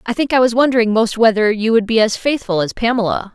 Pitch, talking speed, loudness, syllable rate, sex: 225 Hz, 250 wpm, -15 LUFS, 6.2 syllables/s, female